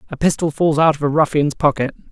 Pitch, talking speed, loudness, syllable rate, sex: 150 Hz, 225 wpm, -17 LUFS, 6.2 syllables/s, male